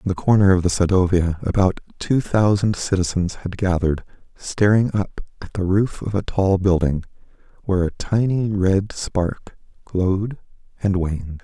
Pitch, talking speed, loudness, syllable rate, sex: 95 Hz, 150 wpm, -20 LUFS, 4.7 syllables/s, male